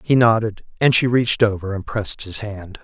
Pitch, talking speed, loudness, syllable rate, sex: 110 Hz, 210 wpm, -18 LUFS, 5.5 syllables/s, male